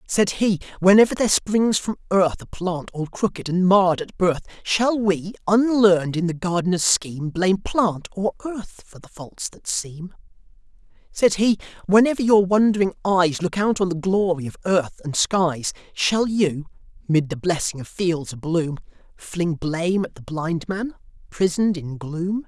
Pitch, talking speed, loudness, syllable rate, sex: 185 Hz, 170 wpm, -21 LUFS, 4.5 syllables/s, male